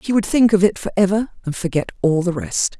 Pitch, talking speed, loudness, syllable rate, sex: 185 Hz, 260 wpm, -18 LUFS, 5.7 syllables/s, female